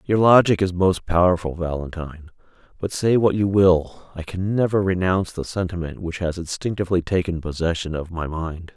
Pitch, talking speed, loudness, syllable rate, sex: 90 Hz, 170 wpm, -21 LUFS, 5.3 syllables/s, male